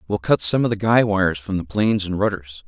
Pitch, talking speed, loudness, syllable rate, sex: 100 Hz, 270 wpm, -19 LUFS, 6.0 syllables/s, male